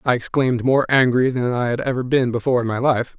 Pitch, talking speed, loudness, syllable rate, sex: 125 Hz, 245 wpm, -19 LUFS, 6.2 syllables/s, male